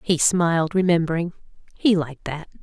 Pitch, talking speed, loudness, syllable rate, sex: 175 Hz, 115 wpm, -21 LUFS, 5.6 syllables/s, female